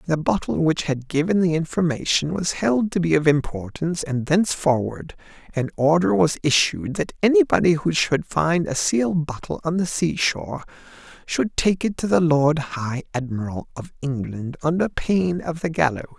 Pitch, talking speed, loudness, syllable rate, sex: 155 Hz, 170 wpm, -21 LUFS, 4.9 syllables/s, male